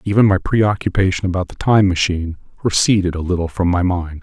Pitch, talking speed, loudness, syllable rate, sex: 95 Hz, 185 wpm, -17 LUFS, 6.0 syllables/s, male